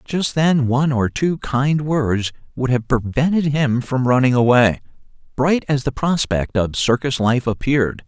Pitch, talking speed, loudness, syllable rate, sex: 135 Hz, 165 wpm, -18 LUFS, 4.3 syllables/s, male